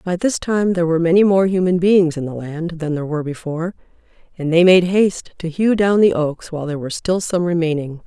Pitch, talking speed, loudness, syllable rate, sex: 170 Hz, 230 wpm, -17 LUFS, 6.2 syllables/s, female